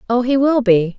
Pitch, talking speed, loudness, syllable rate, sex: 235 Hz, 245 wpm, -15 LUFS, 5.1 syllables/s, female